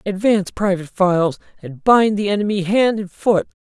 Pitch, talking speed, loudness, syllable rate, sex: 195 Hz, 165 wpm, -17 LUFS, 5.4 syllables/s, male